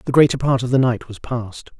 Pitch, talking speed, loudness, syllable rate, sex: 125 Hz, 270 wpm, -19 LUFS, 5.7 syllables/s, male